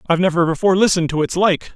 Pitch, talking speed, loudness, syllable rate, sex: 175 Hz, 240 wpm, -16 LUFS, 8.5 syllables/s, male